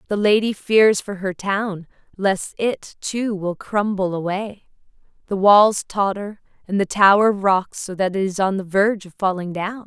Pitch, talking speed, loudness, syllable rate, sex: 200 Hz, 175 wpm, -19 LUFS, 4.3 syllables/s, female